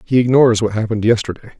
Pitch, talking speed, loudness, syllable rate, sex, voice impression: 115 Hz, 190 wpm, -15 LUFS, 8.3 syllables/s, male, very masculine, very adult-like, very middle-aged, very thick, tensed, very powerful, bright, hard, slightly muffled, fluent, very cool, intellectual, sincere, calm, mature, friendly, reassuring, slightly elegant, wild, slightly sweet, slightly lively, kind, slightly modest